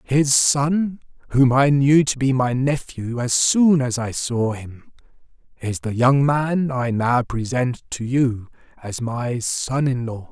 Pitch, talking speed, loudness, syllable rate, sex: 130 Hz, 170 wpm, -20 LUFS, 3.5 syllables/s, male